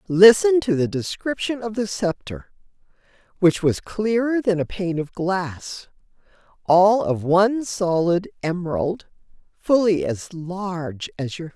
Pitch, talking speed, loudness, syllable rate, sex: 190 Hz, 135 wpm, -21 LUFS, 4.1 syllables/s, female